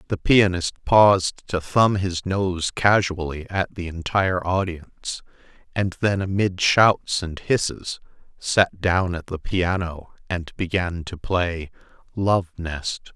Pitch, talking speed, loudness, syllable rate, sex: 90 Hz, 130 wpm, -22 LUFS, 3.7 syllables/s, male